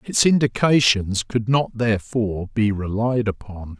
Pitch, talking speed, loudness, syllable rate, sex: 115 Hz, 125 wpm, -20 LUFS, 4.4 syllables/s, male